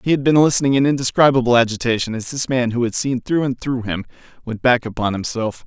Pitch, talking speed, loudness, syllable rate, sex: 125 Hz, 220 wpm, -18 LUFS, 6.2 syllables/s, male